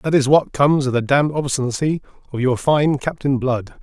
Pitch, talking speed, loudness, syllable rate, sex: 135 Hz, 205 wpm, -18 LUFS, 5.5 syllables/s, male